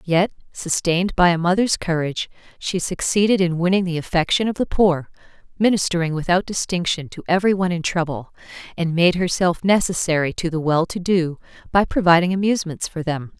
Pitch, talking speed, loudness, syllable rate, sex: 175 Hz, 160 wpm, -20 LUFS, 5.7 syllables/s, female